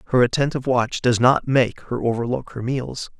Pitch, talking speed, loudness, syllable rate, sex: 125 Hz, 190 wpm, -21 LUFS, 5.2 syllables/s, male